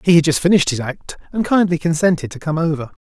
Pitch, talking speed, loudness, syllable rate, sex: 160 Hz, 240 wpm, -17 LUFS, 6.6 syllables/s, male